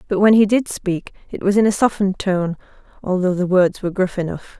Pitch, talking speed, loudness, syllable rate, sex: 190 Hz, 220 wpm, -18 LUFS, 5.8 syllables/s, female